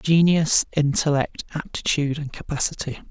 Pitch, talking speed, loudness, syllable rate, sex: 150 Hz, 95 wpm, -22 LUFS, 4.9 syllables/s, male